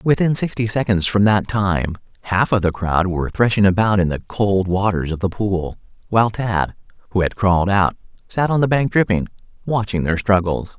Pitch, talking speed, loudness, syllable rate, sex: 100 Hz, 190 wpm, -18 LUFS, 5.1 syllables/s, male